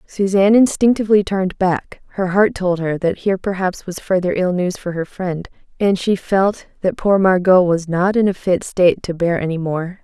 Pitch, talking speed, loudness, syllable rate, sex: 185 Hz, 205 wpm, -17 LUFS, 5.1 syllables/s, female